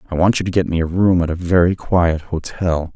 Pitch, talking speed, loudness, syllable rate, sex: 85 Hz, 265 wpm, -17 LUFS, 5.3 syllables/s, male